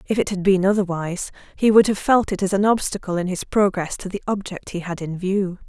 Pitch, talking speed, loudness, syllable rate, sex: 190 Hz, 245 wpm, -21 LUFS, 5.8 syllables/s, female